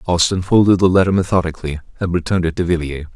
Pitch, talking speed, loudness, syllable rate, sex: 90 Hz, 190 wpm, -17 LUFS, 7.3 syllables/s, male